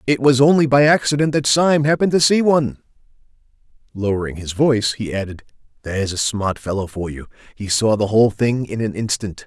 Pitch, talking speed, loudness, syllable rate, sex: 120 Hz, 190 wpm, -18 LUFS, 5.8 syllables/s, male